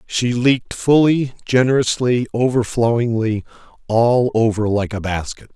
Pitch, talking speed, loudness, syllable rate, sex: 120 Hz, 110 wpm, -17 LUFS, 4.4 syllables/s, male